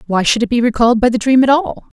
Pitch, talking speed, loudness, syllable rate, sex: 240 Hz, 300 wpm, -13 LUFS, 6.8 syllables/s, female